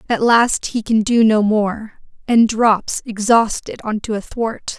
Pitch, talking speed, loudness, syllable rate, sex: 220 Hz, 175 wpm, -16 LUFS, 3.7 syllables/s, female